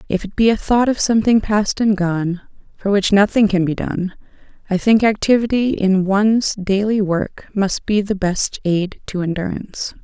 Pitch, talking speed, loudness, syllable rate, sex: 200 Hz, 180 wpm, -17 LUFS, 4.7 syllables/s, female